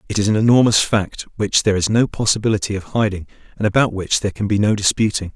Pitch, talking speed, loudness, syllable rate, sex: 105 Hz, 225 wpm, -17 LUFS, 6.7 syllables/s, male